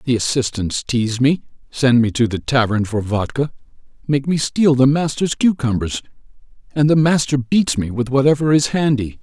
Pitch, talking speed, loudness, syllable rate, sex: 130 Hz, 170 wpm, -17 LUFS, 5.0 syllables/s, male